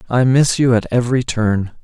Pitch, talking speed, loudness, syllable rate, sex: 120 Hz, 195 wpm, -15 LUFS, 5.0 syllables/s, male